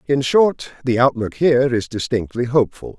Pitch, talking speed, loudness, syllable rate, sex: 130 Hz, 160 wpm, -18 LUFS, 5.2 syllables/s, male